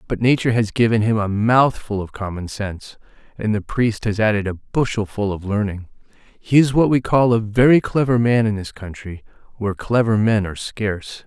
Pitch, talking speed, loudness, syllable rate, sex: 110 Hz, 190 wpm, -19 LUFS, 5.4 syllables/s, male